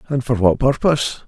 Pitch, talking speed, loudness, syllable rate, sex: 125 Hz, 190 wpm, -17 LUFS, 5.7 syllables/s, male